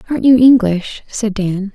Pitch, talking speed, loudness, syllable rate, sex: 215 Hz, 170 wpm, -13 LUFS, 4.6 syllables/s, female